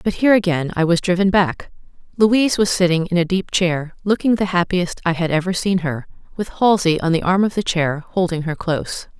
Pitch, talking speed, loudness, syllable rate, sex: 180 Hz, 215 wpm, -18 LUFS, 5.5 syllables/s, female